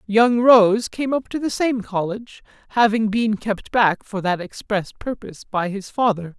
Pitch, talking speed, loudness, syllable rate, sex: 215 Hz, 180 wpm, -20 LUFS, 4.4 syllables/s, male